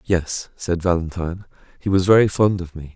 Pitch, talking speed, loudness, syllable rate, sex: 90 Hz, 185 wpm, -20 LUFS, 5.3 syllables/s, male